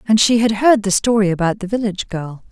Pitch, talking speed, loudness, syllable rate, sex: 205 Hz, 240 wpm, -16 LUFS, 6.0 syllables/s, female